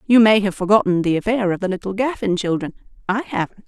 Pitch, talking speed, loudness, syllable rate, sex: 200 Hz, 210 wpm, -19 LUFS, 6.2 syllables/s, female